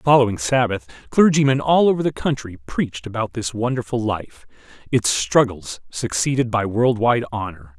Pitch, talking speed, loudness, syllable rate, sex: 115 Hz, 145 wpm, -20 LUFS, 5.1 syllables/s, male